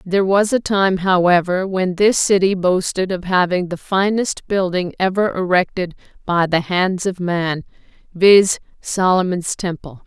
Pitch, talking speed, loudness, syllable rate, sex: 185 Hz, 145 wpm, -17 LUFS, 4.3 syllables/s, female